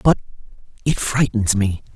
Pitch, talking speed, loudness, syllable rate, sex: 115 Hz, 125 wpm, -20 LUFS, 4.6 syllables/s, male